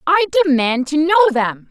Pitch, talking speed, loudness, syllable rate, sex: 290 Hz, 175 wpm, -15 LUFS, 5.1 syllables/s, female